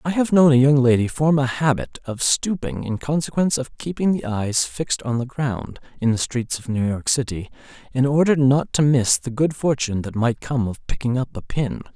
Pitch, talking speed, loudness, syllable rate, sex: 130 Hz, 220 wpm, -21 LUFS, 5.2 syllables/s, male